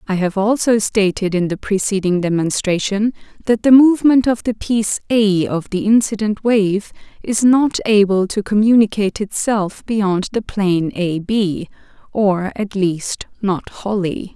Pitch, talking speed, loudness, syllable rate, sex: 205 Hz, 145 wpm, -17 LUFS, 4.3 syllables/s, female